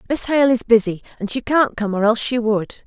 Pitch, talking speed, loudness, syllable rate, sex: 230 Hz, 250 wpm, -18 LUFS, 5.6 syllables/s, female